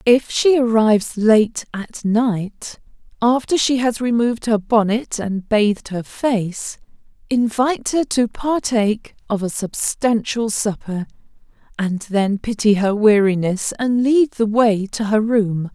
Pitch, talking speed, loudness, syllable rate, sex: 220 Hz, 135 wpm, -18 LUFS, 3.9 syllables/s, female